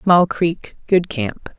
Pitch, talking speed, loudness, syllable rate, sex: 175 Hz, 115 wpm, -18 LUFS, 2.8 syllables/s, female